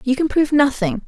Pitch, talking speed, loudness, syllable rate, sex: 265 Hz, 225 wpm, -17 LUFS, 6.3 syllables/s, female